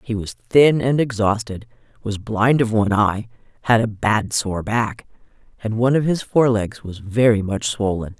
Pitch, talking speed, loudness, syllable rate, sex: 110 Hz, 175 wpm, -19 LUFS, 4.7 syllables/s, female